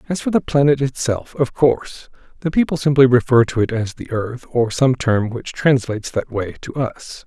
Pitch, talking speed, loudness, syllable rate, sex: 130 Hz, 200 wpm, -18 LUFS, 5.0 syllables/s, male